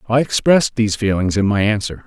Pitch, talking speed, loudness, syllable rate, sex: 110 Hz, 205 wpm, -16 LUFS, 6.4 syllables/s, male